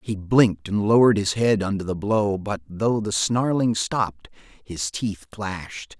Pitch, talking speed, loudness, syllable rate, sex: 100 Hz, 170 wpm, -22 LUFS, 4.4 syllables/s, male